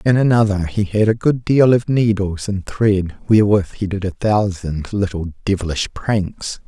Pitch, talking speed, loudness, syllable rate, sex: 100 Hz, 170 wpm, -18 LUFS, 4.5 syllables/s, male